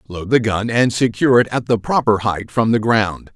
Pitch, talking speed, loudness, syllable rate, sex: 110 Hz, 230 wpm, -17 LUFS, 5.0 syllables/s, male